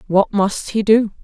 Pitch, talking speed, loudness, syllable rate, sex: 205 Hz, 195 wpm, -17 LUFS, 4.0 syllables/s, female